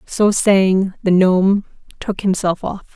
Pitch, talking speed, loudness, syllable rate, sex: 190 Hz, 140 wpm, -16 LUFS, 3.8 syllables/s, female